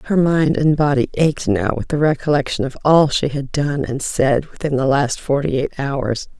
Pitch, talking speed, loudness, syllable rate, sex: 140 Hz, 205 wpm, -18 LUFS, 4.8 syllables/s, female